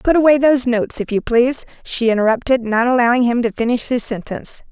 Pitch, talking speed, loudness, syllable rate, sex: 240 Hz, 205 wpm, -16 LUFS, 6.4 syllables/s, female